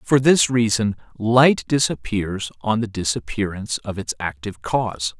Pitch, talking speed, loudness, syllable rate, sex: 105 Hz, 140 wpm, -20 LUFS, 4.6 syllables/s, male